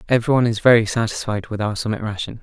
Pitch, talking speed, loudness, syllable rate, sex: 110 Hz, 200 wpm, -19 LUFS, 7.1 syllables/s, male